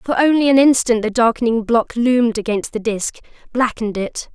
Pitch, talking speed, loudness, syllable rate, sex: 235 Hz, 180 wpm, -17 LUFS, 5.3 syllables/s, female